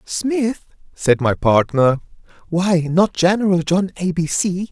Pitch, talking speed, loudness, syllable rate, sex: 175 Hz, 140 wpm, -18 LUFS, 3.8 syllables/s, male